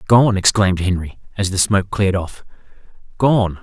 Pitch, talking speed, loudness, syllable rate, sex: 100 Hz, 150 wpm, -17 LUFS, 5.5 syllables/s, male